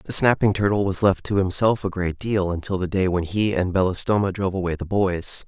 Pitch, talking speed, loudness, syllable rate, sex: 95 Hz, 230 wpm, -22 LUFS, 5.7 syllables/s, male